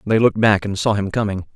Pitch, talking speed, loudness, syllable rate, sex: 105 Hz, 270 wpm, -18 LUFS, 6.5 syllables/s, male